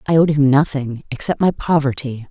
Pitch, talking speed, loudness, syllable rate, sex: 140 Hz, 180 wpm, -17 LUFS, 5.2 syllables/s, female